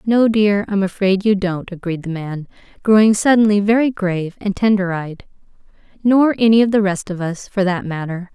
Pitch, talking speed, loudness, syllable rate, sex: 195 Hz, 185 wpm, -17 LUFS, 5.1 syllables/s, female